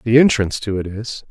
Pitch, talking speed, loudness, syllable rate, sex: 115 Hz, 230 wpm, -18 LUFS, 6.0 syllables/s, male